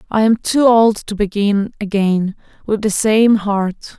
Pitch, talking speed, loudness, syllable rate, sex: 210 Hz, 165 wpm, -15 LUFS, 4.1 syllables/s, female